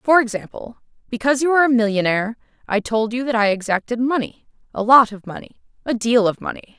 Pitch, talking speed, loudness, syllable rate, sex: 235 Hz, 195 wpm, -18 LUFS, 6.2 syllables/s, female